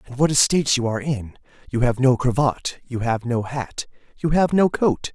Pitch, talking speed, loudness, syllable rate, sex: 130 Hz, 220 wpm, -21 LUFS, 5.1 syllables/s, male